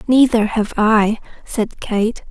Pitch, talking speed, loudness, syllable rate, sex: 220 Hz, 130 wpm, -17 LUFS, 3.3 syllables/s, female